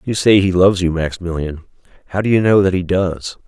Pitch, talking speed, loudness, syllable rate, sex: 90 Hz, 225 wpm, -16 LUFS, 6.0 syllables/s, male